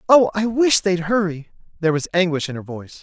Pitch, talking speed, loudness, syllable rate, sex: 180 Hz, 220 wpm, -19 LUFS, 5.9 syllables/s, male